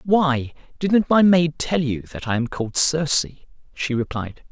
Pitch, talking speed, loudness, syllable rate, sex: 150 Hz, 175 wpm, -20 LUFS, 4.4 syllables/s, male